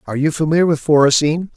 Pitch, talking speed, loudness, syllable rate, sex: 155 Hz, 190 wpm, -15 LUFS, 7.1 syllables/s, male